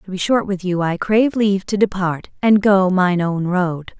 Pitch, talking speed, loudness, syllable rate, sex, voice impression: 190 Hz, 225 wpm, -17 LUFS, 4.8 syllables/s, female, feminine, slightly adult-like, slightly tensed, sincere, slightly kind